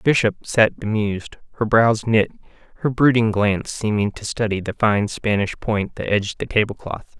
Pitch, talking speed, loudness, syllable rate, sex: 110 Hz, 175 wpm, -20 LUFS, 5.1 syllables/s, male